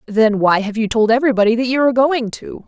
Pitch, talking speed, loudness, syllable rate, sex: 235 Hz, 245 wpm, -15 LUFS, 6.4 syllables/s, female